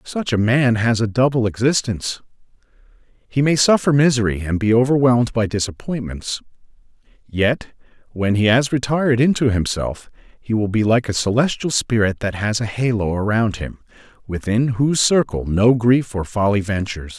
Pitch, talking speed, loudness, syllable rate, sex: 115 Hz, 155 wpm, -18 LUFS, 5.1 syllables/s, male